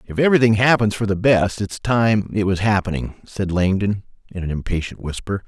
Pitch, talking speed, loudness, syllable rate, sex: 100 Hz, 185 wpm, -19 LUFS, 5.5 syllables/s, male